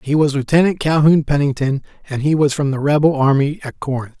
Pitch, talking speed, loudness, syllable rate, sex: 145 Hz, 215 wpm, -16 LUFS, 6.1 syllables/s, male